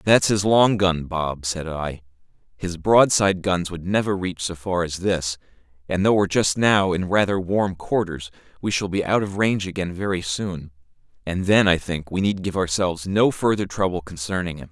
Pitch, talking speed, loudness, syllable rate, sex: 90 Hz, 195 wpm, -22 LUFS, 5.0 syllables/s, male